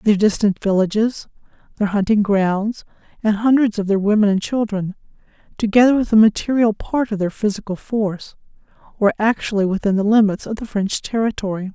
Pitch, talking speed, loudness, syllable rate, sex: 210 Hz, 160 wpm, -18 LUFS, 5.6 syllables/s, female